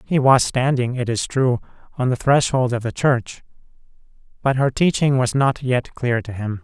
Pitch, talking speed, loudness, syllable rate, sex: 125 Hz, 190 wpm, -19 LUFS, 4.6 syllables/s, male